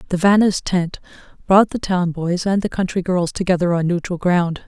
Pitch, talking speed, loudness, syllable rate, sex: 180 Hz, 195 wpm, -18 LUFS, 5.0 syllables/s, female